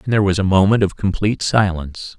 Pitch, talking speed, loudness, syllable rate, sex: 100 Hz, 220 wpm, -17 LUFS, 6.5 syllables/s, male